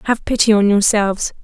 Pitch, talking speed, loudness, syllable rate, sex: 215 Hz, 165 wpm, -15 LUFS, 5.8 syllables/s, female